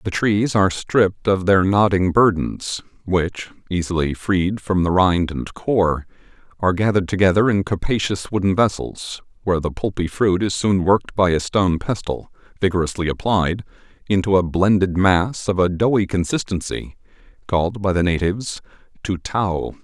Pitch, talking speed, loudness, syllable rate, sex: 95 Hz, 150 wpm, -19 LUFS, 5.0 syllables/s, male